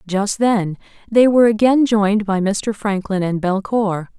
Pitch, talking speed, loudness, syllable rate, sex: 205 Hz, 160 wpm, -17 LUFS, 4.4 syllables/s, female